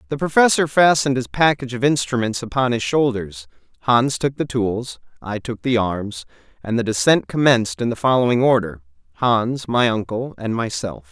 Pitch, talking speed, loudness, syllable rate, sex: 120 Hz, 165 wpm, -19 LUFS, 5.2 syllables/s, male